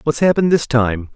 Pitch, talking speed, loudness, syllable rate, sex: 135 Hz, 205 wpm, -16 LUFS, 5.9 syllables/s, male